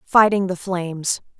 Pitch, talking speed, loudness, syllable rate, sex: 185 Hz, 130 wpm, -20 LUFS, 4.6 syllables/s, female